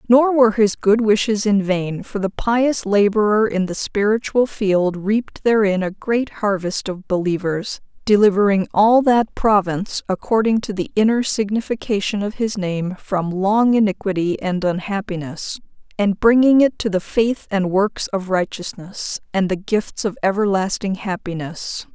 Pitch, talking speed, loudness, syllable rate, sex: 205 Hz, 150 wpm, -19 LUFS, 3.9 syllables/s, female